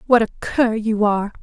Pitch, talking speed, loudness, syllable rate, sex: 220 Hz, 210 wpm, -19 LUFS, 5.7 syllables/s, female